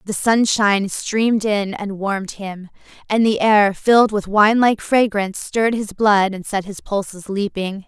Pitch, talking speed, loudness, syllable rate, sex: 205 Hz, 170 wpm, -18 LUFS, 4.8 syllables/s, female